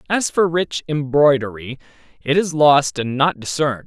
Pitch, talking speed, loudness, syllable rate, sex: 145 Hz, 155 wpm, -18 LUFS, 4.6 syllables/s, male